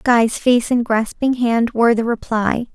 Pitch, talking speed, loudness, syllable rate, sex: 230 Hz, 175 wpm, -17 LUFS, 4.3 syllables/s, female